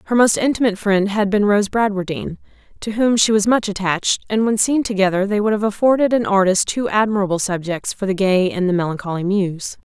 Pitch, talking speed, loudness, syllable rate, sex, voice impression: 205 Hz, 205 wpm, -18 LUFS, 5.9 syllables/s, female, feminine, adult-like, slightly fluent, slightly intellectual